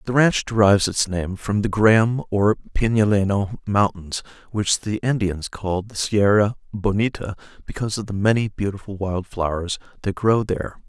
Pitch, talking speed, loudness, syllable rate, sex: 105 Hz, 155 wpm, -21 LUFS, 5.0 syllables/s, male